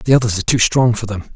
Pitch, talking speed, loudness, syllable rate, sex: 115 Hz, 310 wpm, -15 LUFS, 6.9 syllables/s, male